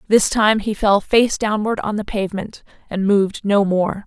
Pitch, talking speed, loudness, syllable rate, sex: 205 Hz, 190 wpm, -18 LUFS, 4.7 syllables/s, female